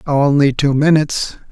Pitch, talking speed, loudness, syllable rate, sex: 145 Hz, 120 wpm, -14 LUFS, 4.7 syllables/s, male